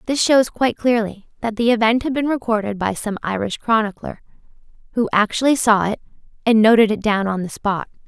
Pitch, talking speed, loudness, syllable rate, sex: 220 Hz, 185 wpm, -18 LUFS, 5.6 syllables/s, female